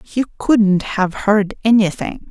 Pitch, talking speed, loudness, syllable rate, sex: 210 Hz, 130 wpm, -16 LUFS, 4.0 syllables/s, female